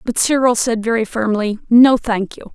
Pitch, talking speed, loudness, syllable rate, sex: 230 Hz, 190 wpm, -15 LUFS, 4.7 syllables/s, female